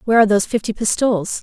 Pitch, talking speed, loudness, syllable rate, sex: 215 Hz, 210 wpm, -17 LUFS, 8.4 syllables/s, female